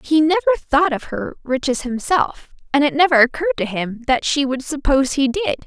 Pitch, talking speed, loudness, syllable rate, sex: 285 Hz, 200 wpm, -18 LUFS, 5.5 syllables/s, female